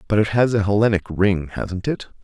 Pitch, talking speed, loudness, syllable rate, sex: 100 Hz, 215 wpm, -20 LUFS, 5.3 syllables/s, male